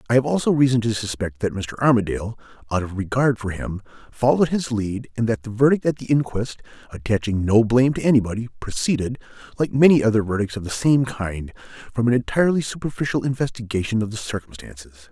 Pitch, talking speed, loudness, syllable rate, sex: 115 Hz, 185 wpm, -21 LUFS, 5.7 syllables/s, male